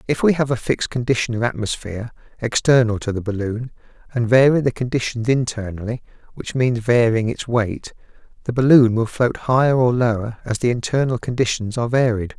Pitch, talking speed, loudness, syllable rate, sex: 120 Hz, 170 wpm, -19 LUFS, 5.7 syllables/s, male